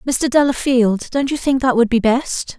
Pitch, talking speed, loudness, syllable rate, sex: 250 Hz, 210 wpm, -16 LUFS, 4.5 syllables/s, female